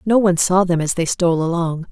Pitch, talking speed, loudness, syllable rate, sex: 175 Hz, 250 wpm, -17 LUFS, 6.2 syllables/s, female